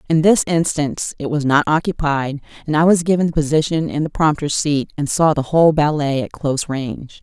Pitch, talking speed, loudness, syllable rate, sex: 150 Hz, 210 wpm, -17 LUFS, 5.6 syllables/s, female